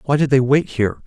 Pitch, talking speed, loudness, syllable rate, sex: 135 Hz, 285 wpm, -17 LUFS, 6.8 syllables/s, male